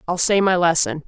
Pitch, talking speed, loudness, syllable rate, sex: 175 Hz, 225 wpm, -17 LUFS, 5.5 syllables/s, female